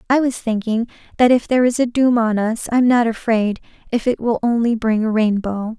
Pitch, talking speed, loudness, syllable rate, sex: 230 Hz, 230 wpm, -18 LUFS, 5.5 syllables/s, female